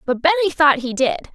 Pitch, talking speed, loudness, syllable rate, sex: 295 Hz, 225 wpm, -17 LUFS, 6.8 syllables/s, female